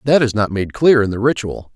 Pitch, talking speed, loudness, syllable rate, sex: 115 Hz, 275 wpm, -16 LUFS, 5.6 syllables/s, male